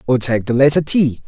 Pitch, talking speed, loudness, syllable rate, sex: 135 Hz, 235 wpm, -15 LUFS, 5.5 syllables/s, male